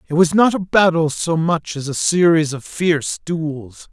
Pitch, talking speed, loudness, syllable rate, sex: 160 Hz, 200 wpm, -17 LUFS, 4.3 syllables/s, male